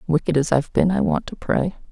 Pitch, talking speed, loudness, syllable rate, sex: 175 Hz, 250 wpm, -21 LUFS, 6.2 syllables/s, female